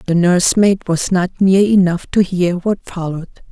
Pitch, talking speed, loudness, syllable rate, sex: 185 Hz, 170 wpm, -15 LUFS, 4.9 syllables/s, female